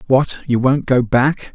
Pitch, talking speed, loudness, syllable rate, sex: 130 Hz, 195 wpm, -16 LUFS, 3.9 syllables/s, male